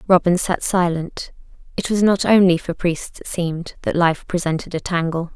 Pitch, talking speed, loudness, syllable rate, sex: 175 Hz, 180 wpm, -19 LUFS, 4.9 syllables/s, female